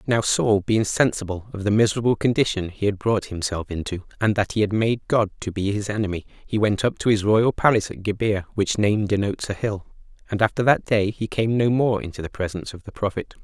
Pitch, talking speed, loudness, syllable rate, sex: 105 Hz, 230 wpm, -22 LUFS, 5.8 syllables/s, male